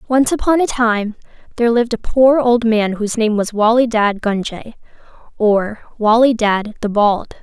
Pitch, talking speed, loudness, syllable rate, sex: 225 Hz, 170 wpm, -15 LUFS, 4.8 syllables/s, female